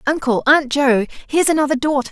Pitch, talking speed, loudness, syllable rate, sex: 280 Hz, 170 wpm, -16 LUFS, 6.3 syllables/s, female